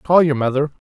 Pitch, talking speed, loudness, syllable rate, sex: 145 Hz, 210 wpm, -17 LUFS, 5.8 syllables/s, male